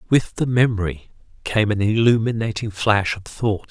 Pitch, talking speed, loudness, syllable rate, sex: 105 Hz, 160 wpm, -20 LUFS, 5.2 syllables/s, male